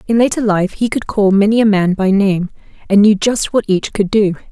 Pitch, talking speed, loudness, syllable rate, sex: 205 Hz, 240 wpm, -14 LUFS, 5.3 syllables/s, female